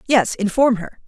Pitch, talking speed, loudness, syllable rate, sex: 225 Hz, 170 wpm, -18 LUFS, 4.8 syllables/s, female